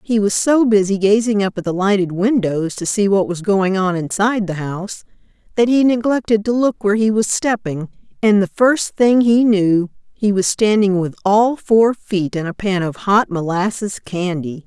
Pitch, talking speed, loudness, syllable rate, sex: 200 Hz, 195 wpm, -16 LUFS, 4.7 syllables/s, female